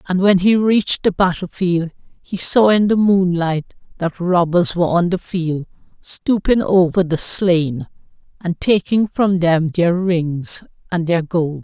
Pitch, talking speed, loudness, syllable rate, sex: 180 Hz, 160 wpm, -17 LUFS, 3.9 syllables/s, female